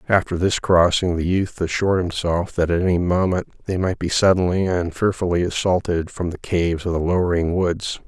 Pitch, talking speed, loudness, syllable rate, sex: 90 Hz, 185 wpm, -20 LUFS, 5.4 syllables/s, male